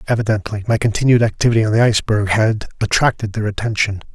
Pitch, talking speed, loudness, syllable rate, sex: 110 Hz, 160 wpm, -17 LUFS, 6.8 syllables/s, male